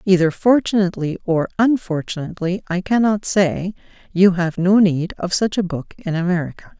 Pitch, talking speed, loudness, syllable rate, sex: 185 Hz, 135 wpm, -18 LUFS, 5.1 syllables/s, female